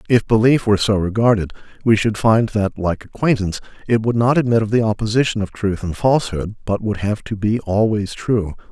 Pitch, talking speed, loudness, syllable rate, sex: 110 Hz, 200 wpm, -18 LUFS, 5.6 syllables/s, male